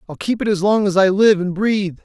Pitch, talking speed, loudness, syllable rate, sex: 195 Hz, 295 wpm, -16 LUFS, 5.9 syllables/s, male